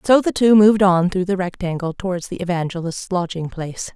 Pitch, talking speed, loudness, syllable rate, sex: 185 Hz, 195 wpm, -19 LUFS, 5.7 syllables/s, female